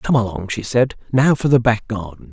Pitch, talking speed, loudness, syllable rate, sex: 115 Hz, 235 wpm, -18 LUFS, 5.2 syllables/s, male